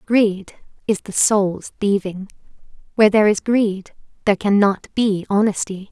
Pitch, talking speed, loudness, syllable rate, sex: 205 Hz, 140 wpm, -18 LUFS, 4.5 syllables/s, female